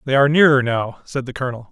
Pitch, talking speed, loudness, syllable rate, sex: 130 Hz, 245 wpm, -17 LUFS, 7.2 syllables/s, male